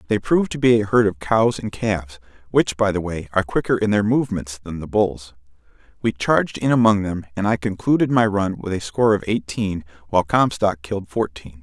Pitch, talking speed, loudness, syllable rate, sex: 100 Hz, 205 wpm, -20 LUFS, 5.7 syllables/s, male